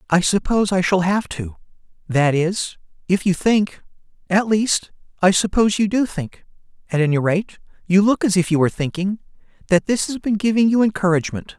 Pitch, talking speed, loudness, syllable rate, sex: 190 Hz, 160 wpm, -19 LUFS, 5.4 syllables/s, male